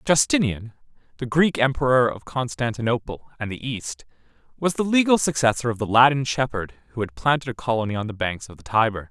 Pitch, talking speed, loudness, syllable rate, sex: 125 Hz, 185 wpm, -22 LUFS, 5.7 syllables/s, male